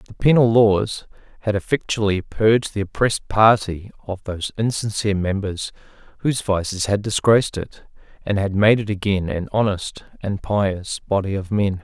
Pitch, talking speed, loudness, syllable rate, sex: 100 Hz, 150 wpm, -20 LUFS, 5.0 syllables/s, male